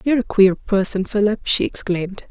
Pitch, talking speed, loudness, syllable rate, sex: 205 Hz, 180 wpm, -18 LUFS, 5.5 syllables/s, female